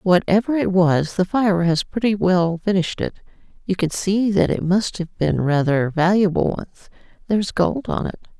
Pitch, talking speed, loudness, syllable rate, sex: 180 Hz, 170 wpm, -19 LUFS, 4.9 syllables/s, female